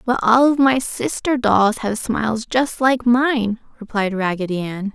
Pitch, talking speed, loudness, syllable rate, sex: 230 Hz, 170 wpm, -18 LUFS, 4.1 syllables/s, female